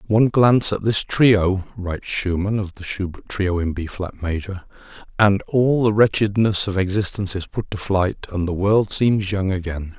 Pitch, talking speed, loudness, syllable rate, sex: 100 Hz, 185 wpm, -20 LUFS, 4.8 syllables/s, male